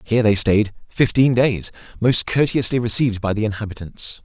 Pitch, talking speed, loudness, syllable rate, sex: 110 Hz, 155 wpm, -18 LUFS, 5.4 syllables/s, male